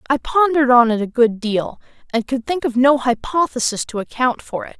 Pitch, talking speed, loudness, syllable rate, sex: 255 Hz, 215 wpm, -18 LUFS, 5.4 syllables/s, female